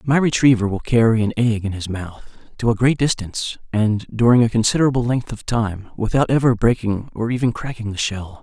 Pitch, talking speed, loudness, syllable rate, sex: 115 Hz, 200 wpm, -19 LUFS, 5.5 syllables/s, male